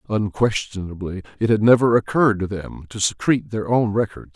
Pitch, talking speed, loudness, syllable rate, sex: 105 Hz, 165 wpm, -20 LUFS, 5.6 syllables/s, male